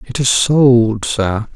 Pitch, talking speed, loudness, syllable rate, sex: 120 Hz, 155 wpm, -13 LUFS, 3.0 syllables/s, male